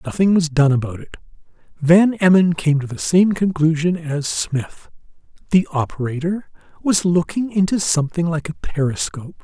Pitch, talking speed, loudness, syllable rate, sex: 165 Hz, 145 wpm, -18 LUFS, 4.9 syllables/s, male